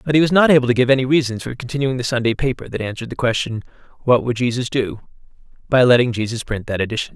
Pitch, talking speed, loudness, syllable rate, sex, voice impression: 125 Hz, 235 wpm, -18 LUFS, 7.3 syllables/s, male, masculine, adult-like, thick, tensed, powerful, bright, slightly soft, clear, fluent, cool, very intellectual, refreshing, sincere, slightly calm, friendly, reassuring, unique, elegant, slightly wild, lively, slightly strict, intense, sharp